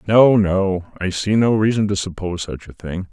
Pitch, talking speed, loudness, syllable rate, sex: 95 Hz, 210 wpm, -18 LUFS, 5.0 syllables/s, male